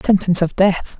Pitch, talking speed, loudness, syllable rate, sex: 185 Hz, 180 wpm, -16 LUFS, 5.9 syllables/s, female